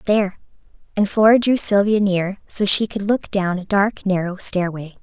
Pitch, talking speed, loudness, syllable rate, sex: 200 Hz, 180 wpm, -18 LUFS, 4.8 syllables/s, female